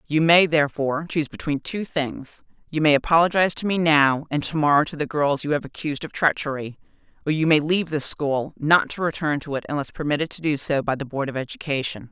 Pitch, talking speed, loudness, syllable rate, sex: 150 Hz, 225 wpm, -22 LUFS, 6.0 syllables/s, female